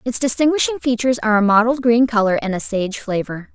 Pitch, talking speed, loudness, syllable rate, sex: 230 Hz, 205 wpm, -17 LUFS, 6.2 syllables/s, female